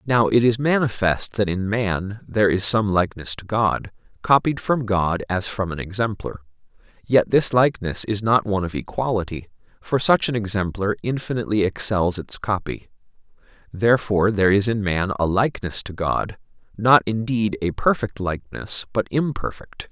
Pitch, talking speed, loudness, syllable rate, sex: 105 Hz, 155 wpm, -21 LUFS, 5.1 syllables/s, male